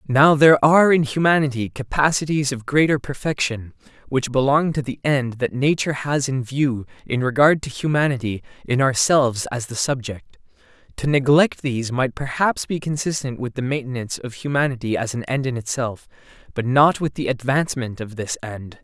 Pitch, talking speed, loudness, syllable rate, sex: 130 Hz, 170 wpm, -20 LUFS, 5.3 syllables/s, male